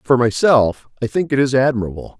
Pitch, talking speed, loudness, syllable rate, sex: 120 Hz, 190 wpm, -17 LUFS, 5.6 syllables/s, male